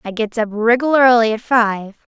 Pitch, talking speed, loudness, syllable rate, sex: 230 Hz, 190 wpm, -15 LUFS, 5.4 syllables/s, female